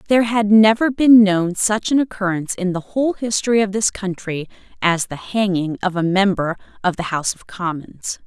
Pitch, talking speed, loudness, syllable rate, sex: 200 Hz, 190 wpm, -18 LUFS, 5.2 syllables/s, female